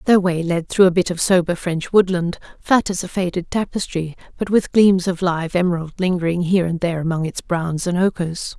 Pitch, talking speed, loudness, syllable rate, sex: 180 Hz, 210 wpm, -19 LUFS, 5.4 syllables/s, female